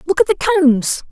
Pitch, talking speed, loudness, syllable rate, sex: 310 Hz, 215 wpm, -14 LUFS, 6.3 syllables/s, female